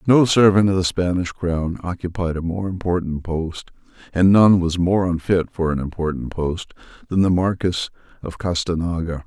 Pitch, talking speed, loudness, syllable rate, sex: 90 Hz, 160 wpm, -20 LUFS, 4.8 syllables/s, male